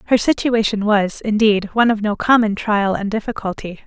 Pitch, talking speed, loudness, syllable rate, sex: 215 Hz, 170 wpm, -17 LUFS, 5.4 syllables/s, female